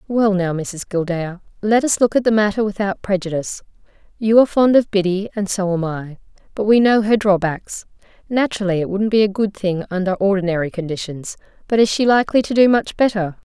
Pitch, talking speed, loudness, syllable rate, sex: 200 Hz, 195 wpm, -18 LUFS, 5.8 syllables/s, female